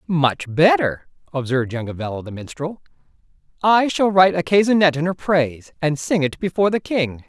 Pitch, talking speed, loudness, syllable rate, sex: 160 Hz, 165 wpm, -19 LUFS, 5.5 syllables/s, male